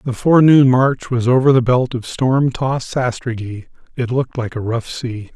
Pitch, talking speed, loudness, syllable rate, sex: 125 Hz, 190 wpm, -16 LUFS, 4.8 syllables/s, male